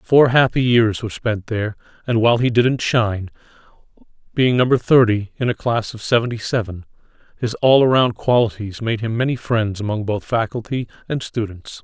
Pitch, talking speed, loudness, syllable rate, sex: 115 Hz, 160 wpm, -18 LUFS, 5.3 syllables/s, male